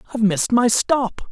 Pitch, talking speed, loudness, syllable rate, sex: 225 Hz, 185 wpm, -18 LUFS, 6.4 syllables/s, male